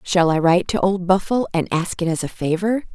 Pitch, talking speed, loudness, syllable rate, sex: 180 Hz, 245 wpm, -19 LUFS, 5.6 syllables/s, female